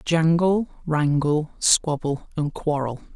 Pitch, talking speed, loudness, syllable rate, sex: 155 Hz, 95 wpm, -22 LUFS, 3.4 syllables/s, male